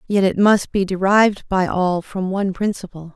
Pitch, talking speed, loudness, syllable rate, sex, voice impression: 190 Hz, 190 wpm, -18 LUFS, 5.1 syllables/s, female, very feminine, slightly young, very adult-like, relaxed, weak, slightly dark, soft, very clear, very fluent, cute, refreshing, very sincere, calm, very friendly, very reassuring, slightly unique, elegant, sweet, slightly lively, very kind, very modest, light